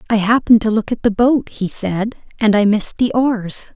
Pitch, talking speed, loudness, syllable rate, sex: 220 Hz, 225 wpm, -16 LUFS, 5.4 syllables/s, female